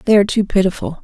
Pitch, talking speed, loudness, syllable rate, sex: 190 Hz, 230 wpm, -16 LUFS, 8.1 syllables/s, female